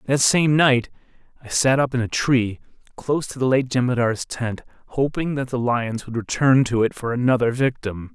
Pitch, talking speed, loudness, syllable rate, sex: 125 Hz, 190 wpm, -21 LUFS, 5.0 syllables/s, male